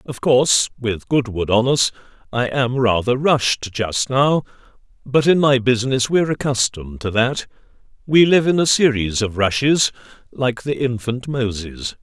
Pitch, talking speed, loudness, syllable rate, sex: 125 Hz, 150 wpm, -18 LUFS, 4.5 syllables/s, male